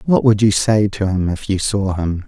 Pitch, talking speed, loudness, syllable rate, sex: 100 Hz, 265 wpm, -17 LUFS, 4.7 syllables/s, male